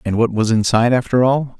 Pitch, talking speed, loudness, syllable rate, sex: 120 Hz, 225 wpm, -16 LUFS, 6.1 syllables/s, male